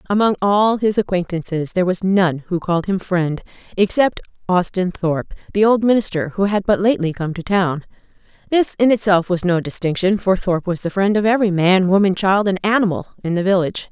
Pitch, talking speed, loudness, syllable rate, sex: 190 Hz, 195 wpm, -18 LUFS, 5.6 syllables/s, female